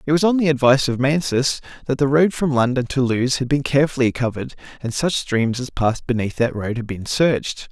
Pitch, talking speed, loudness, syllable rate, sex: 130 Hz, 225 wpm, -19 LUFS, 6.0 syllables/s, male